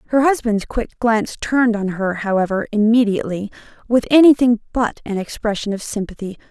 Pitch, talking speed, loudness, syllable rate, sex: 220 Hz, 150 wpm, -18 LUFS, 5.7 syllables/s, female